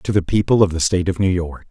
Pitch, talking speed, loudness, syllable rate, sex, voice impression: 90 Hz, 315 wpm, -18 LUFS, 6.7 syllables/s, male, masculine, adult-like, tensed, bright, clear, fluent, cool, intellectual, friendly, elegant, slightly wild, lively, slightly light